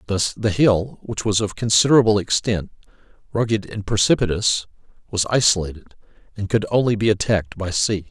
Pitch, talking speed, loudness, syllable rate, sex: 105 Hz, 150 wpm, -20 LUFS, 5.5 syllables/s, male